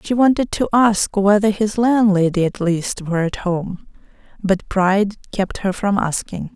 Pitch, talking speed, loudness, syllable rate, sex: 200 Hz, 165 wpm, -18 LUFS, 4.4 syllables/s, female